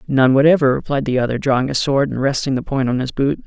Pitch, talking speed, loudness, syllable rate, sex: 135 Hz, 260 wpm, -17 LUFS, 6.4 syllables/s, male